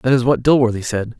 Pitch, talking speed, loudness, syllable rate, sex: 125 Hz, 250 wpm, -16 LUFS, 6.1 syllables/s, male